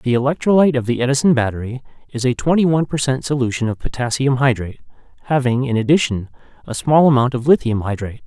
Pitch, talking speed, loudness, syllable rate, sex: 130 Hz, 180 wpm, -17 LUFS, 6.7 syllables/s, male